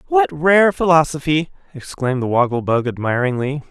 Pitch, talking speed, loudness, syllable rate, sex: 150 Hz, 130 wpm, -17 LUFS, 5.2 syllables/s, male